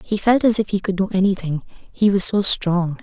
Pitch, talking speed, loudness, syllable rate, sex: 195 Hz, 240 wpm, -18 LUFS, 5.2 syllables/s, female